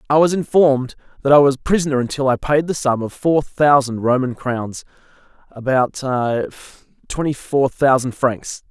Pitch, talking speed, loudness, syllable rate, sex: 135 Hz, 145 wpm, -17 LUFS, 4.6 syllables/s, male